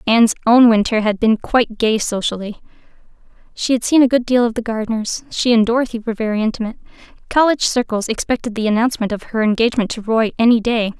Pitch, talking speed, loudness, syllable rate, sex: 225 Hz, 190 wpm, -17 LUFS, 6.6 syllables/s, female